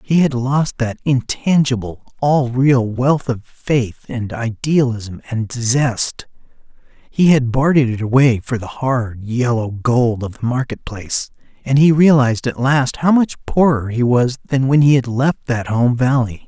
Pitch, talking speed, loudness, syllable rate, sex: 125 Hz, 165 wpm, -16 LUFS, 4.2 syllables/s, male